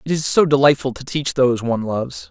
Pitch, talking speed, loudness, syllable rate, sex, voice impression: 135 Hz, 235 wpm, -18 LUFS, 6.4 syllables/s, male, masculine, adult-like, slightly clear, slightly cool, refreshing, sincere, slightly kind